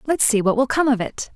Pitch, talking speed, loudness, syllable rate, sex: 245 Hz, 310 wpm, -19 LUFS, 5.9 syllables/s, female